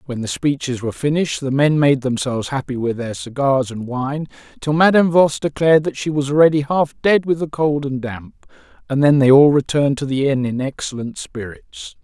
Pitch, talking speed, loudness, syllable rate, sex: 140 Hz, 205 wpm, -17 LUFS, 5.4 syllables/s, male